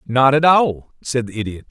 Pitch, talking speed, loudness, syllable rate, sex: 130 Hz, 210 wpm, -17 LUFS, 4.9 syllables/s, male